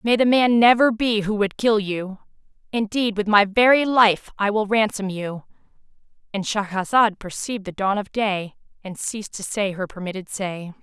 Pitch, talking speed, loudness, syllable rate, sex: 205 Hz, 170 wpm, -21 LUFS, 4.8 syllables/s, female